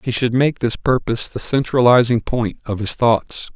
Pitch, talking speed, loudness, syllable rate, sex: 120 Hz, 185 wpm, -17 LUFS, 4.8 syllables/s, male